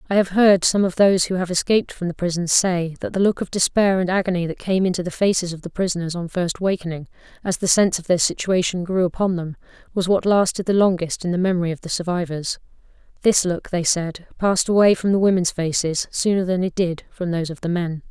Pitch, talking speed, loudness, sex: 180 Hz, 230 wpm, -20 LUFS, female